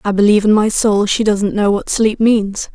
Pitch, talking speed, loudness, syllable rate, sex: 210 Hz, 240 wpm, -14 LUFS, 4.9 syllables/s, female